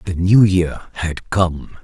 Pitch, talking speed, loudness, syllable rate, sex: 90 Hz, 165 wpm, -17 LUFS, 2.9 syllables/s, male